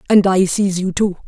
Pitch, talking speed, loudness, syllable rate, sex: 190 Hz, 235 wpm, -16 LUFS, 5.0 syllables/s, female